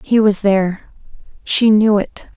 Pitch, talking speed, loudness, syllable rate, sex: 205 Hz, 155 wpm, -14 LUFS, 4.1 syllables/s, female